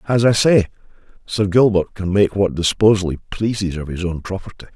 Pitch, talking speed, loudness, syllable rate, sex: 100 Hz, 190 wpm, -18 LUFS, 5.5 syllables/s, male